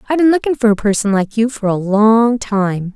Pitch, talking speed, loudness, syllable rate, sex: 220 Hz, 245 wpm, -14 LUFS, 5.4 syllables/s, female